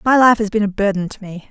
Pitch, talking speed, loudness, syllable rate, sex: 210 Hz, 320 wpm, -16 LUFS, 6.4 syllables/s, female